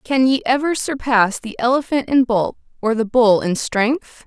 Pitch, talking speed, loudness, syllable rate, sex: 245 Hz, 185 wpm, -18 LUFS, 4.4 syllables/s, female